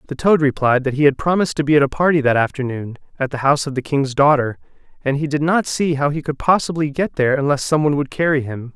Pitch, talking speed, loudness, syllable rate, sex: 145 Hz, 260 wpm, -18 LUFS, 6.6 syllables/s, male